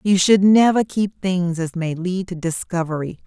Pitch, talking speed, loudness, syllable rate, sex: 180 Hz, 185 wpm, -19 LUFS, 4.5 syllables/s, female